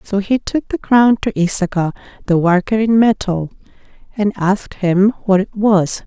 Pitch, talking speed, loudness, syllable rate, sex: 200 Hz, 170 wpm, -15 LUFS, 4.6 syllables/s, female